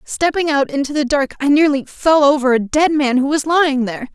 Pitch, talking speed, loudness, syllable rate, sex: 285 Hz, 230 wpm, -15 LUFS, 5.6 syllables/s, female